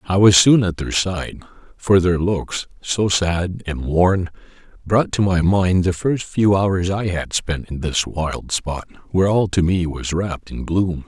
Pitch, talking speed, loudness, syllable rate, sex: 90 Hz, 195 wpm, -19 LUFS, 3.9 syllables/s, male